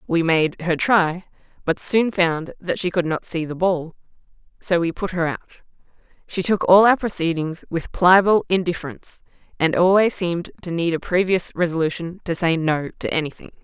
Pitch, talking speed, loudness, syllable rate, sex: 175 Hz, 175 wpm, -20 LUFS, 5.1 syllables/s, female